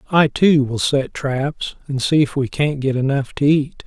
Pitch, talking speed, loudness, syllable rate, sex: 140 Hz, 215 wpm, -18 LUFS, 4.3 syllables/s, male